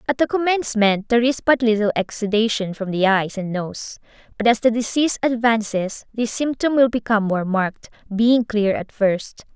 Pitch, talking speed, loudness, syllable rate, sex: 225 Hz, 175 wpm, -20 LUFS, 5.2 syllables/s, female